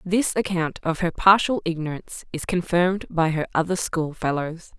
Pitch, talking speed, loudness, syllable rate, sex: 170 Hz, 165 wpm, -23 LUFS, 5.1 syllables/s, female